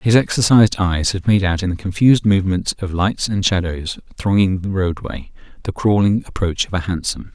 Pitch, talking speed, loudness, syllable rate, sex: 95 Hz, 190 wpm, -17 LUFS, 5.4 syllables/s, male